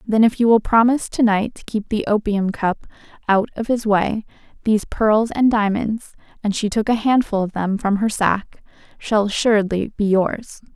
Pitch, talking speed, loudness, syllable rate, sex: 215 Hz, 190 wpm, -19 LUFS, 4.9 syllables/s, female